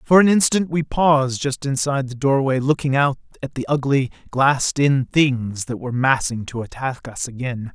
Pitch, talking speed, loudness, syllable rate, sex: 135 Hz, 185 wpm, -20 LUFS, 5.0 syllables/s, male